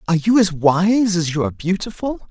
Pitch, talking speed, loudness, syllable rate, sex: 185 Hz, 210 wpm, -18 LUFS, 5.6 syllables/s, male